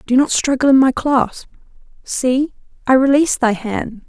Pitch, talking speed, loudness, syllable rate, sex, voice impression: 260 Hz, 145 wpm, -16 LUFS, 4.6 syllables/s, female, feminine, adult-like, relaxed, slightly dark, soft, slightly halting, calm, slightly friendly, kind, modest